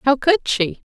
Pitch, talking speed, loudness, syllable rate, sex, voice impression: 275 Hz, 200 wpm, -18 LUFS, 4.9 syllables/s, female, feminine, adult-like, clear, slightly intellectual, slightly calm, elegant